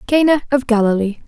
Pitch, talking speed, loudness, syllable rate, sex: 245 Hz, 140 wpm, -16 LUFS, 5.8 syllables/s, female